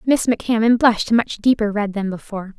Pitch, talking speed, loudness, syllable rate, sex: 220 Hz, 210 wpm, -18 LUFS, 6.1 syllables/s, female